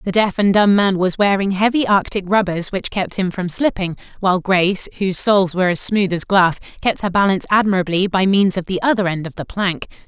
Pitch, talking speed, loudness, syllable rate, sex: 190 Hz, 220 wpm, -17 LUFS, 5.8 syllables/s, female